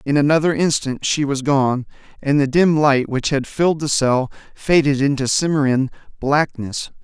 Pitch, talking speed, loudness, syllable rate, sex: 140 Hz, 160 wpm, -18 LUFS, 4.7 syllables/s, male